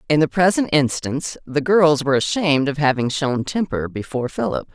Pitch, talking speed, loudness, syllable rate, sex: 145 Hz, 175 wpm, -19 LUFS, 5.6 syllables/s, female